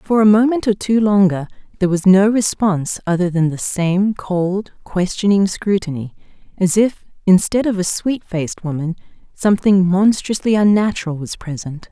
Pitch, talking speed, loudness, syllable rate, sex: 190 Hz, 150 wpm, -17 LUFS, 4.9 syllables/s, female